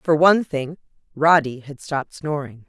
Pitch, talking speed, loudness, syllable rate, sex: 150 Hz, 155 wpm, -20 LUFS, 5.0 syllables/s, female